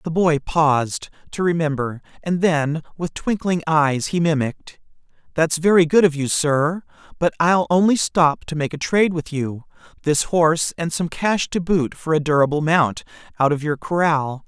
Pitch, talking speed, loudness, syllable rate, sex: 160 Hz, 175 wpm, -19 LUFS, 4.7 syllables/s, male